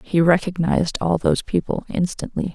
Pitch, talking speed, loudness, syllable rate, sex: 175 Hz, 140 wpm, -21 LUFS, 5.4 syllables/s, female